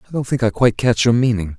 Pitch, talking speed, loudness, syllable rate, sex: 115 Hz, 305 wpm, -17 LUFS, 7.0 syllables/s, male